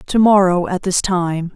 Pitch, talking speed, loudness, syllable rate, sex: 185 Hz, 195 wpm, -16 LUFS, 4.2 syllables/s, female